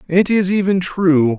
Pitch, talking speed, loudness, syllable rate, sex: 175 Hz, 175 wpm, -16 LUFS, 4.1 syllables/s, male